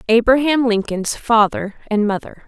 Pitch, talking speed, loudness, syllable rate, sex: 225 Hz, 120 wpm, -17 LUFS, 4.6 syllables/s, female